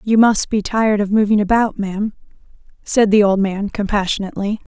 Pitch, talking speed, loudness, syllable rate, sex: 205 Hz, 165 wpm, -17 LUFS, 5.7 syllables/s, female